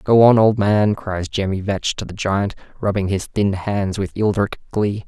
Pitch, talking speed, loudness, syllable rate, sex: 100 Hz, 200 wpm, -19 LUFS, 4.3 syllables/s, male